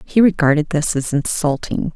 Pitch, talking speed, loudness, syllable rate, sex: 160 Hz, 155 wpm, -17 LUFS, 4.9 syllables/s, female